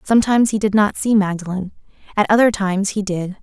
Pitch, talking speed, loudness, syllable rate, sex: 205 Hz, 195 wpm, -17 LUFS, 6.4 syllables/s, female